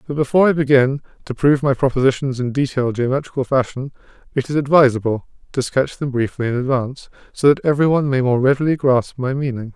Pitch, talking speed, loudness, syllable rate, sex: 135 Hz, 185 wpm, -18 LUFS, 6.5 syllables/s, male